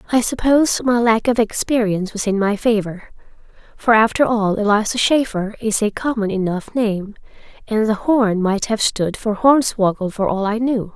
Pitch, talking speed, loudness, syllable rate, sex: 220 Hz, 175 wpm, -18 LUFS, 4.9 syllables/s, female